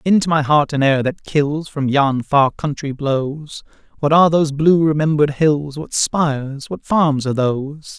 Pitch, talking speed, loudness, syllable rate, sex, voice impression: 150 Hz, 180 wpm, -17 LUFS, 4.5 syllables/s, male, masculine, adult-like, slightly clear, refreshing, sincere, slightly friendly